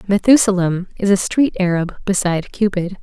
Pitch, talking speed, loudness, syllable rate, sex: 190 Hz, 140 wpm, -17 LUFS, 5.2 syllables/s, female